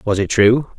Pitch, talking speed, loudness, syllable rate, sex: 110 Hz, 230 wpm, -15 LUFS, 4.8 syllables/s, male